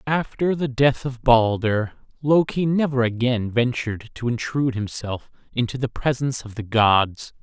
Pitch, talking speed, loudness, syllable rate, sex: 125 Hz, 145 wpm, -22 LUFS, 4.6 syllables/s, male